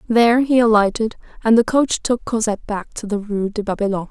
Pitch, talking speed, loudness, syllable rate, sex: 220 Hz, 205 wpm, -18 LUFS, 6.0 syllables/s, female